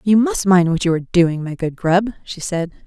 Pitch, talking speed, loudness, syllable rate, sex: 180 Hz, 250 wpm, -18 LUFS, 5.1 syllables/s, female